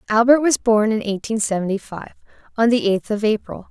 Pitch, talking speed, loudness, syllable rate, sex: 215 Hz, 195 wpm, -19 LUFS, 5.5 syllables/s, female